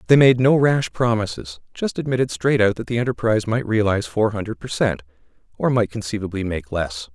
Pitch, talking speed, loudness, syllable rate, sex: 110 Hz, 195 wpm, -20 LUFS, 5.8 syllables/s, male